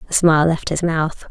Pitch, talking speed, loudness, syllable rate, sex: 160 Hz, 230 wpm, -17 LUFS, 5.3 syllables/s, female